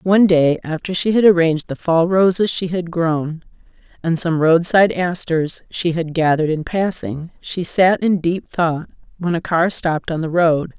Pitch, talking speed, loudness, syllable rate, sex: 170 Hz, 185 wpm, -17 LUFS, 4.7 syllables/s, female